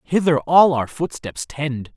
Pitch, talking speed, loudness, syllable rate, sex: 145 Hz, 155 wpm, -19 LUFS, 3.8 syllables/s, male